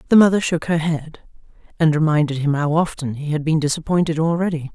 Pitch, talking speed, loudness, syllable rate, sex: 155 Hz, 190 wpm, -19 LUFS, 6.0 syllables/s, female